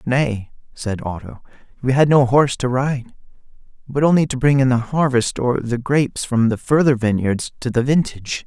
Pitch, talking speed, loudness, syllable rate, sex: 125 Hz, 185 wpm, -18 LUFS, 5.0 syllables/s, male